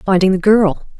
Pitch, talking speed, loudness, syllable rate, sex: 195 Hz, 180 wpm, -13 LUFS, 5.3 syllables/s, female